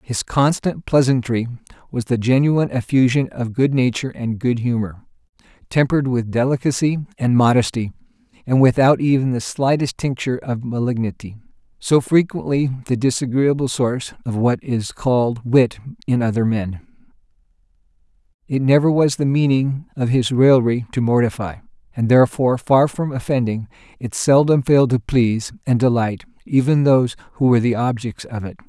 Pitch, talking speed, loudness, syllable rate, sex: 125 Hz, 145 wpm, -18 LUFS, 5.3 syllables/s, male